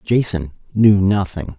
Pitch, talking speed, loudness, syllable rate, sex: 95 Hz, 115 wpm, -17 LUFS, 3.9 syllables/s, male